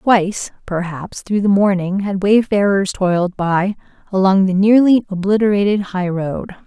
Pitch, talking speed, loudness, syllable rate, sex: 195 Hz, 135 wpm, -16 LUFS, 4.5 syllables/s, female